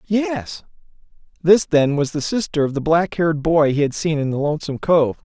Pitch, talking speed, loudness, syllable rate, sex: 160 Hz, 205 wpm, -19 LUFS, 5.3 syllables/s, male